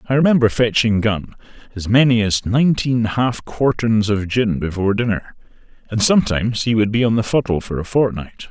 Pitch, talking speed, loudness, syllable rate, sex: 110 Hz, 175 wpm, -17 LUFS, 5.4 syllables/s, male